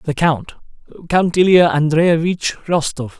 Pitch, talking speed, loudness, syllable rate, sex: 160 Hz, 95 wpm, -16 LUFS, 4.4 syllables/s, male